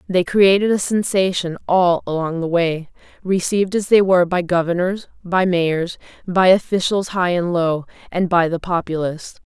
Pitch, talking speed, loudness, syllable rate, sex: 180 Hz, 160 wpm, -18 LUFS, 4.8 syllables/s, female